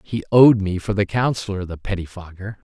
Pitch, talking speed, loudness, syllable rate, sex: 100 Hz, 175 wpm, -19 LUFS, 5.3 syllables/s, male